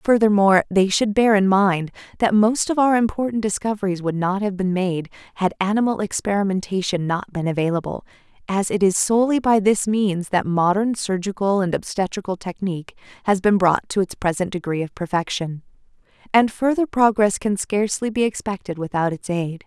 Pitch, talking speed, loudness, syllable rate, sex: 195 Hz, 170 wpm, -20 LUFS, 5.4 syllables/s, female